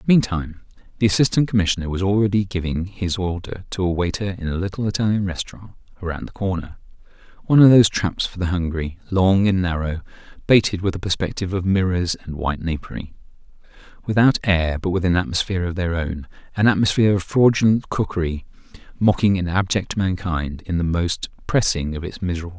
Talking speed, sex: 165 wpm, male